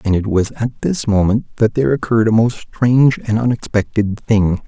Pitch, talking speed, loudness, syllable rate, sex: 110 Hz, 190 wpm, -16 LUFS, 5.4 syllables/s, male